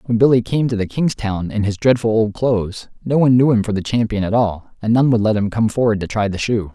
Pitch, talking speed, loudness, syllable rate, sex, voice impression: 110 Hz, 285 wpm, -17 LUFS, 6.0 syllables/s, male, very masculine, adult-like, slightly middle-aged, very thick, tensed, powerful, slightly bright, slightly soft, muffled, very fluent, slightly raspy, cool, slightly intellectual, slightly refreshing, very sincere, slightly calm, mature, slightly friendly, slightly reassuring, unique, elegant, slightly wild, very lively, intense, light